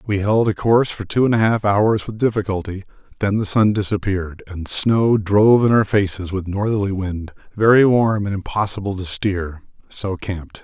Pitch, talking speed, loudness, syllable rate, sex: 100 Hz, 180 wpm, -18 LUFS, 5.1 syllables/s, male